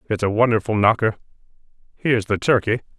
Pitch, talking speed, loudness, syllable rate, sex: 110 Hz, 120 wpm, -20 LUFS, 6.9 syllables/s, male